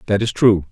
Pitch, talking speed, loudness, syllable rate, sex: 105 Hz, 250 wpm, -16 LUFS, 5.8 syllables/s, male